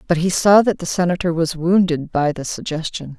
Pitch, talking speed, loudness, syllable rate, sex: 170 Hz, 205 wpm, -18 LUFS, 5.3 syllables/s, female